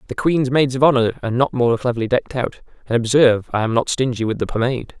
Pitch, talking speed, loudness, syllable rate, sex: 125 Hz, 240 wpm, -18 LUFS, 6.8 syllables/s, male